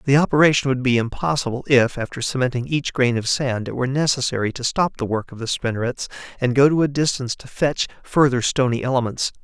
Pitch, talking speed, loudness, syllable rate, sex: 130 Hz, 205 wpm, -20 LUFS, 6.1 syllables/s, male